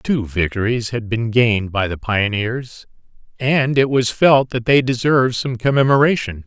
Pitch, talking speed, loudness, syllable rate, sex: 120 Hz, 160 wpm, -17 LUFS, 4.6 syllables/s, male